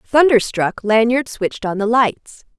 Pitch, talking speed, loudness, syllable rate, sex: 230 Hz, 140 wpm, -16 LUFS, 4.3 syllables/s, female